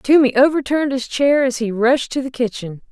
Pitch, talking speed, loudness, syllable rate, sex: 260 Hz, 205 wpm, -17 LUFS, 5.4 syllables/s, female